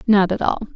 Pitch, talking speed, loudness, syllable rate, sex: 200 Hz, 235 wpm, -19 LUFS, 6.4 syllables/s, female